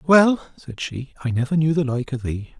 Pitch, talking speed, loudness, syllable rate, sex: 145 Hz, 230 wpm, -22 LUFS, 5.0 syllables/s, male